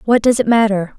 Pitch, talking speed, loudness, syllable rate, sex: 215 Hz, 245 wpm, -14 LUFS, 5.9 syllables/s, female